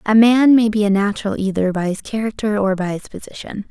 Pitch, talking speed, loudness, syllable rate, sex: 210 Hz, 225 wpm, -17 LUFS, 5.9 syllables/s, female